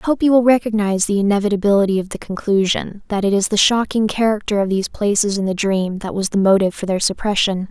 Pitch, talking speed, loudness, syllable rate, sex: 205 Hz, 225 wpm, -17 LUFS, 6.5 syllables/s, female